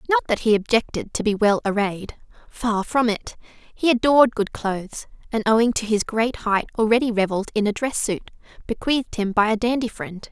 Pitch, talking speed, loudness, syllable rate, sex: 220 Hz, 190 wpm, -21 LUFS, 5.4 syllables/s, female